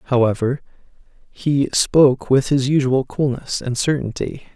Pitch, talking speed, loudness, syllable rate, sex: 130 Hz, 120 wpm, -19 LUFS, 4.3 syllables/s, male